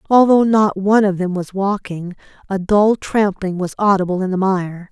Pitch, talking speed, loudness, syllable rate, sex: 195 Hz, 185 wpm, -16 LUFS, 4.8 syllables/s, female